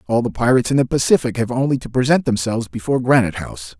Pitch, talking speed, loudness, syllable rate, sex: 120 Hz, 220 wpm, -18 LUFS, 7.5 syllables/s, male